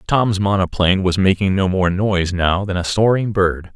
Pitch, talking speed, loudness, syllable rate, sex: 95 Hz, 190 wpm, -17 LUFS, 5.0 syllables/s, male